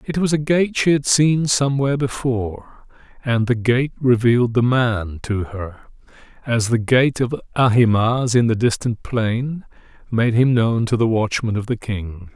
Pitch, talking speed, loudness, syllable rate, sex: 120 Hz, 170 wpm, -18 LUFS, 4.3 syllables/s, male